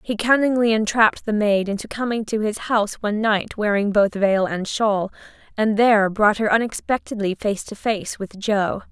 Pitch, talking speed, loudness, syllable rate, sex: 210 Hz, 180 wpm, -20 LUFS, 5.0 syllables/s, female